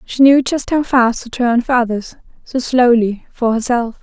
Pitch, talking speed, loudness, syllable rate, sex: 245 Hz, 195 wpm, -15 LUFS, 4.4 syllables/s, female